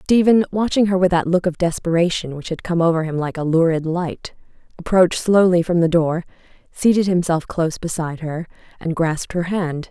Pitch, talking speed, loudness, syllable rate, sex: 170 Hz, 190 wpm, -19 LUFS, 5.6 syllables/s, female